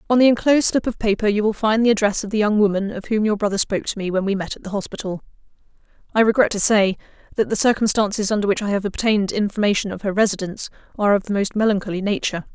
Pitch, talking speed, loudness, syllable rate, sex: 205 Hz, 240 wpm, -20 LUFS, 7.3 syllables/s, female